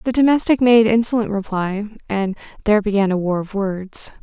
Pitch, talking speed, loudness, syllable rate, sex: 210 Hz, 170 wpm, -18 LUFS, 5.3 syllables/s, female